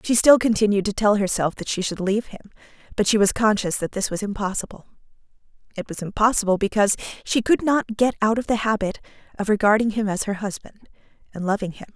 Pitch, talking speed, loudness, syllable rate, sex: 210 Hz, 200 wpm, -21 LUFS, 6.3 syllables/s, female